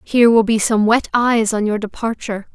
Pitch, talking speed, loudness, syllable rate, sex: 220 Hz, 210 wpm, -16 LUFS, 5.4 syllables/s, female